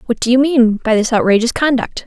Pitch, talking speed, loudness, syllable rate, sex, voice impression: 240 Hz, 230 wpm, -14 LUFS, 5.8 syllables/s, female, feminine, adult-like, tensed, powerful, clear, slightly raspy, intellectual, elegant, lively, slightly strict, sharp